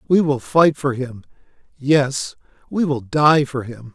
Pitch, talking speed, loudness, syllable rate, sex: 140 Hz, 165 wpm, -18 LUFS, 3.8 syllables/s, male